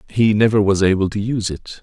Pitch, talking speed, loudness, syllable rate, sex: 105 Hz, 230 wpm, -17 LUFS, 6.1 syllables/s, male